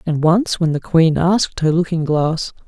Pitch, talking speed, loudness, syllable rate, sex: 165 Hz, 200 wpm, -17 LUFS, 4.5 syllables/s, male